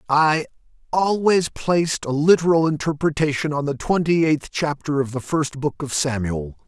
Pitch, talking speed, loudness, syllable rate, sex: 150 Hz, 155 wpm, -21 LUFS, 4.8 syllables/s, male